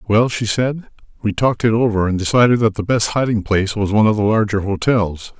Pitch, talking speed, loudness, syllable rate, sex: 110 Hz, 220 wpm, -17 LUFS, 5.8 syllables/s, male